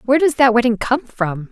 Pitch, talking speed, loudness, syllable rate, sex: 245 Hz, 235 wpm, -16 LUFS, 5.8 syllables/s, female